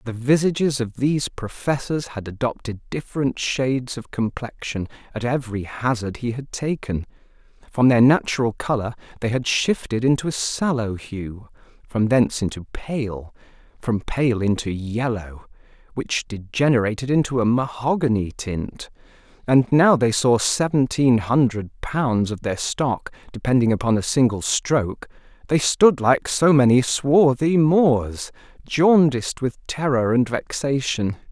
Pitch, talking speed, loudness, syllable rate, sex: 125 Hz, 130 wpm, -21 LUFS, 4.4 syllables/s, male